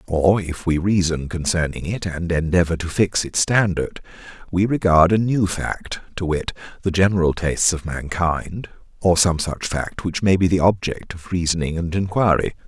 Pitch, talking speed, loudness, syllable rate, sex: 85 Hz, 175 wpm, -20 LUFS, 4.7 syllables/s, male